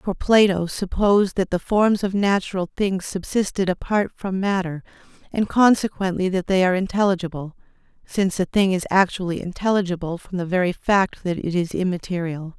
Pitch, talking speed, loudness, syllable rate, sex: 185 Hz, 155 wpm, -21 LUFS, 5.3 syllables/s, female